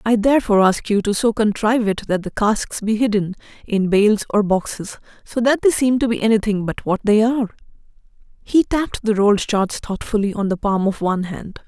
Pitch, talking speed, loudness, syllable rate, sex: 215 Hz, 205 wpm, -18 LUFS, 5.5 syllables/s, female